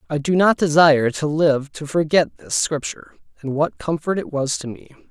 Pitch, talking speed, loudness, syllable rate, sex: 150 Hz, 200 wpm, -19 LUFS, 5.2 syllables/s, male